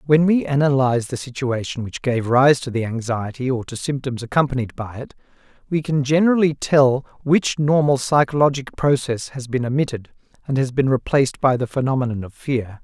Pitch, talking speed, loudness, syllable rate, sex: 130 Hz, 175 wpm, -20 LUFS, 5.4 syllables/s, male